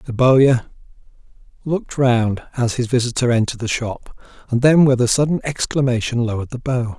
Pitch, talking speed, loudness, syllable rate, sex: 125 Hz, 165 wpm, -18 LUFS, 5.6 syllables/s, male